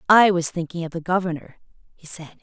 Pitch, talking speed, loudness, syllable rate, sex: 170 Hz, 200 wpm, -22 LUFS, 6.0 syllables/s, female